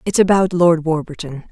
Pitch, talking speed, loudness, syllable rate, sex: 170 Hz, 160 wpm, -15 LUFS, 5.2 syllables/s, female